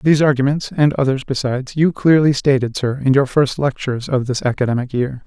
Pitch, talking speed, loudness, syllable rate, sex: 135 Hz, 195 wpm, -17 LUFS, 5.8 syllables/s, male